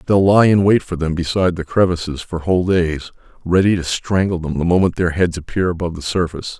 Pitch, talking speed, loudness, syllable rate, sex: 85 Hz, 220 wpm, -17 LUFS, 6.1 syllables/s, male